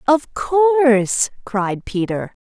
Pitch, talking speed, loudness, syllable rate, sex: 245 Hz, 100 wpm, -18 LUFS, 2.9 syllables/s, female